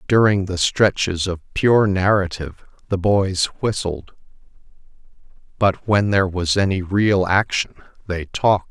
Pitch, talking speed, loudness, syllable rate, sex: 95 Hz, 125 wpm, -19 LUFS, 4.4 syllables/s, male